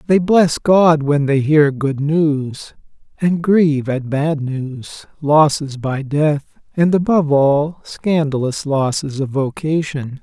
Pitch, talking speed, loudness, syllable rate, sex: 150 Hz, 135 wpm, -16 LUFS, 3.5 syllables/s, male